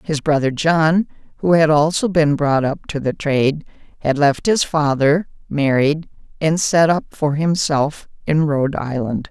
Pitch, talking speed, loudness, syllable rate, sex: 150 Hz, 160 wpm, -17 LUFS, 4.3 syllables/s, female